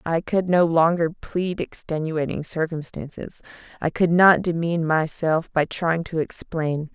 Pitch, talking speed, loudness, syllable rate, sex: 165 Hz, 140 wpm, -22 LUFS, 4.1 syllables/s, female